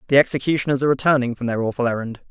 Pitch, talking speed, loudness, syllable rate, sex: 130 Hz, 210 wpm, -20 LUFS, 8.2 syllables/s, male